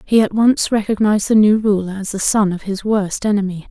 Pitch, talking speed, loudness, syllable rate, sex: 205 Hz, 225 wpm, -16 LUFS, 5.6 syllables/s, female